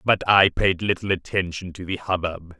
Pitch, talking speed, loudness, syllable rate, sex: 90 Hz, 185 wpm, -22 LUFS, 4.8 syllables/s, male